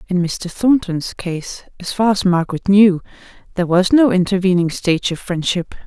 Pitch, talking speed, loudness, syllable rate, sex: 185 Hz, 165 wpm, -17 LUFS, 5.1 syllables/s, female